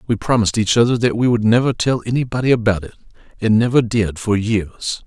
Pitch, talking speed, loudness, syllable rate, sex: 110 Hz, 200 wpm, -17 LUFS, 5.9 syllables/s, male